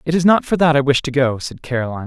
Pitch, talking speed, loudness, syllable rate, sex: 140 Hz, 320 wpm, -17 LUFS, 7.0 syllables/s, male